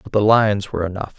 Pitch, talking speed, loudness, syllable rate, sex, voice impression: 100 Hz, 250 wpm, -18 LUFS, 7.1 syllables/s, male, masculine, adult-like, tensed, powerful, slightly dark, clear, slightly fluent, cool, intellectual, calm, reassuring, wild, slightly modest